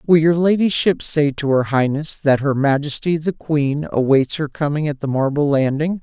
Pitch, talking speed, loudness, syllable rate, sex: 145 Hz, 190 wpm, -18 LUFS, 4.8 syllables/s, male